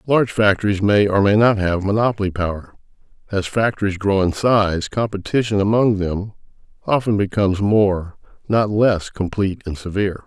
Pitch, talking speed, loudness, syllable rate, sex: 100 Hz, 145 wpm, -18 LUFS, 5.1 syllables/s, male